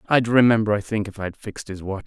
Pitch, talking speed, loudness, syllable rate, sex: 105 Hz, 290 wpm, -21 LUFS, 6.7 syllables/s, male